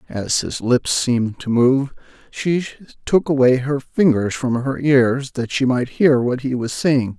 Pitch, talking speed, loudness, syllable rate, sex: 130 Hz, 185 wpm, -18 LUFS, 4.0 syllables/s, male